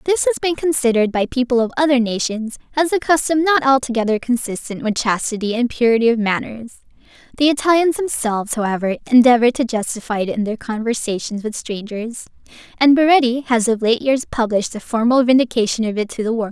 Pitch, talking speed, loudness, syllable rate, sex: 245 Hz, 180 wpm, -17 LUFS, 6.0 syllables/s, female